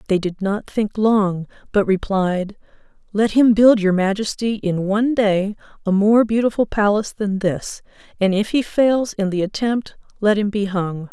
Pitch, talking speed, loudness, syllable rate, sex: 205 Hz, 175 wpm, -19 LUFS, 4.4 syllables/s, female